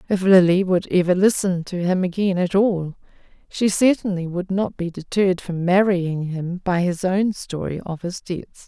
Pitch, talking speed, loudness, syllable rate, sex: 185 Hz, 180 wpm, -20 LUFS, 4.4 syllables/s, female